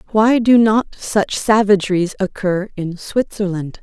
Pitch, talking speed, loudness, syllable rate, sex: 200 Hz, 125 wpm, -16 LUFS, 4.1 syllables/s, female